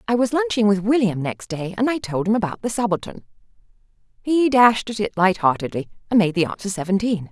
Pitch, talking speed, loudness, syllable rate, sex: 210 Hz, 195 wpm, -20 LUFS, 5.9 syllables/s, female